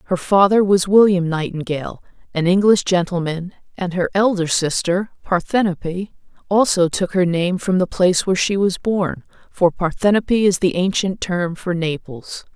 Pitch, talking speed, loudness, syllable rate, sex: 185 Hz, 155 wpm, -18 LUFS, 5.0 syllables/s, female